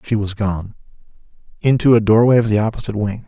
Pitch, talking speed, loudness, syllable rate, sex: 110 Hz, 185 wpm, -16 LUFS, 6.5 syllables/s, male